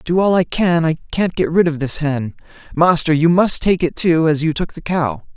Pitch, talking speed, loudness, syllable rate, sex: 165 Hz, 245 wpm, -16 LUFS, 5.0 syllables/s, male